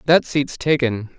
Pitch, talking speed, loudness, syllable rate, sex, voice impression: 135 Hz, 150 wpm, -19 LUFS, 4.1 syllables/s, male, very masculine, very adult-like, middle-aged, very thick, slightly tensed, slightly powerful, slightly bright, slightly soft, clear, fluent, cool, intellectual, refreshing, sincere, very calm, mature, friendly, reassuring, very unique, very elegant, slightly wild, very sweet, slightly lively, kind, slightly modest